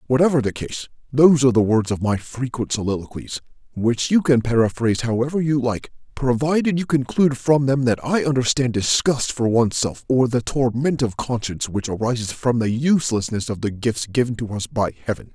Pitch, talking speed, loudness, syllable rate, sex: 120 Hz, 185 wpm, -20 LUFS, 5.6 syllables/s, male